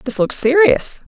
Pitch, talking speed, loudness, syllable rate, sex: 295 Hz, 155 wpm, -14 LUFS, 4.9 syllables/s, female